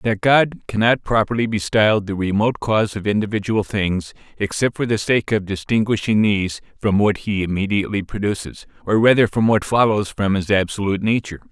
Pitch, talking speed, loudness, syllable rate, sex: 105 Hz, 170 wpm, -19 LUFS, 5.6 syllables/s, male